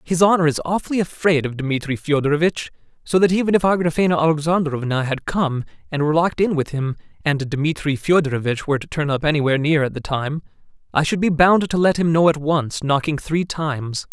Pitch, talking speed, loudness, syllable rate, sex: 155 Hz, 200 wpm, -19 LUFS, 6.0 syllables/s, male